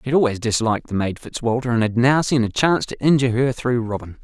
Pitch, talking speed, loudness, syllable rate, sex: 120 Hz, 255 wpm, -20 LUFS, 6.6 syllables/s, male